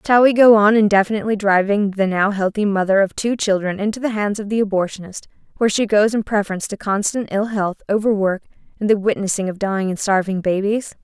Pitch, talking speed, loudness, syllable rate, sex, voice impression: 205 Hz, 200 wpm, -18 LUFS, 6.2 syllables/s, female, feminine, adult-like, slightly relaxed, bright, soft, fluent, slightly raspy, intellectual, calm, friendly, reassuring, elegant, kind, modest